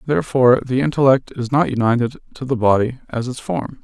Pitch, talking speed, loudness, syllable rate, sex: 130 Hz, 190 wpm, -18 LUFS, 6.2 syllables/s, male